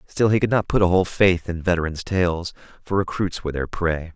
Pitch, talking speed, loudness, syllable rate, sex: 90 Hz, 230 wpm, -21 LUFS, 5.6 syllables/s, male